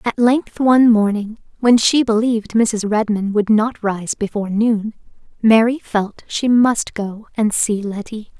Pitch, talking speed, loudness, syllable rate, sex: 220 Hz, 155 wpm, -17 LUFS, 4.2 syllables/s, female